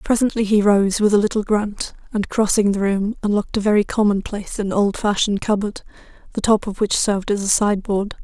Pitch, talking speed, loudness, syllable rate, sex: 205 Hz, 190 wpm, -19 LUFS, 5.9 syllables/s, female